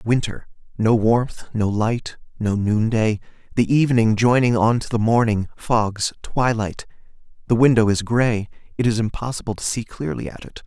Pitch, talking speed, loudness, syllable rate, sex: 110 Hz, 160 wpm, -20 LUFS, 4.7 syllables/s, male